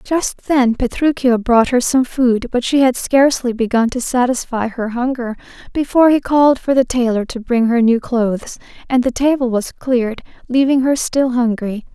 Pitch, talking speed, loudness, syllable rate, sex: 250 Hz, 175 wpm, -16 LUFS, 4.9 syllables/s, female